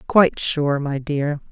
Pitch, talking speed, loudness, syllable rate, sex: 150 Hz, 160 wpm, -20 LUFS, 3.9 syllables/s, female